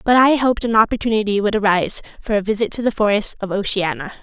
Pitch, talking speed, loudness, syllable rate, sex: 215 Hz, 215 wpm, -18 LUFS, 6.8 syllables/s, female